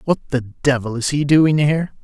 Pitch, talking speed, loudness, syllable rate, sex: 140 Hz, 205 wpm, -17 LUFS, 5.2 syllables/s, male